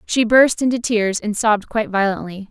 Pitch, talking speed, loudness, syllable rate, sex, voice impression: 215 Hz, 190 wpm, -17 LUFS, 5.4 syllables/s, female, feminine, adult-like, tensed, powerful, bright, clear, fluent, friendly, lively, slightly intense, slightly light